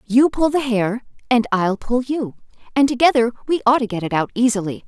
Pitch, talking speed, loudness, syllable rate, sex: 240 Hz, 210 wpm, -19 LUFS, 5.5 syllables/s, female